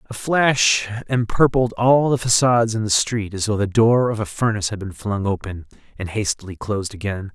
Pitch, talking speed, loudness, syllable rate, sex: 110 Hz, 195 wpm, -19 LUFS, 5.3 syllables/s, male